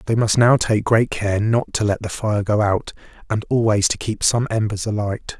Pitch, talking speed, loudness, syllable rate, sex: 105 Hz, 220 wpm, -19 LUFS, 4.8 syllables/s, male